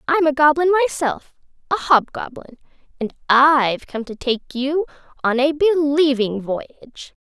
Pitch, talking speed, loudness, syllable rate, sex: 280 Hz, 115 wpm, -18 LUFS, 4.5 syllables/s, female